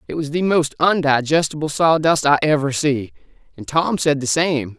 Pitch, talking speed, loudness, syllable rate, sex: 150 Hz, 175 wpm, -18 LUFS, 4.9 syllables/s, male